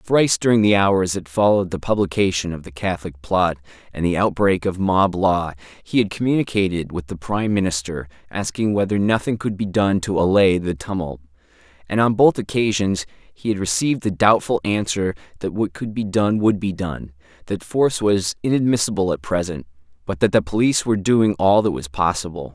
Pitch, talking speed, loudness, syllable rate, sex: 95 Hz, 185 wpm, -20 LUFS, 5.4 syllables/s, male